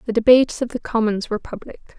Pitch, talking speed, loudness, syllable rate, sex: 230 Hz, 210 wpm, -19 LUFS, 7.1 syllables/s, female